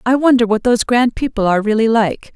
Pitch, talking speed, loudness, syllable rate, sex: 230 Hz, 230 wpm, -15 LUFS, 6.3 syllables/s, female